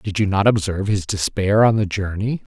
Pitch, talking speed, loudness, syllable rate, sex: 100 Hz, 210 wpm, -19 LUFS, 5.4 syllables/s, male